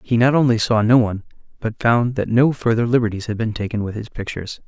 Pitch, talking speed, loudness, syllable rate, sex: 115 Hz, 230 wpm, -19 LUFS, 6.3 syllables/s, male